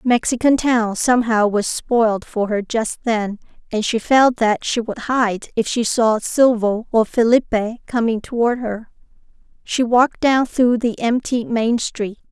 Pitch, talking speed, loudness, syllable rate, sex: 230 Hz, 160 wpm, -18 LUFS, 4.2 syllables/s, female